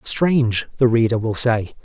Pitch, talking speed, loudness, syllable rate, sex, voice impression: 120 Hz, 165 wpm, -18 LUFS, 4.5 syllables/s, male, very masculine, very adult-like, slightly old, thick, slightly relaxed, slightly weak, slightly dark, slightly soft, slightly clear, fluent, cool, intellectual, very sincere, calm, reassuring, slightly elegant, slightly sweet, kind, slightly modest